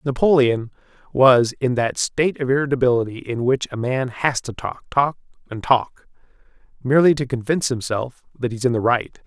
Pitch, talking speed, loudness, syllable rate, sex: 130 Hz, 175 wpm, -20 LUFS, 5.3 syllables/s, male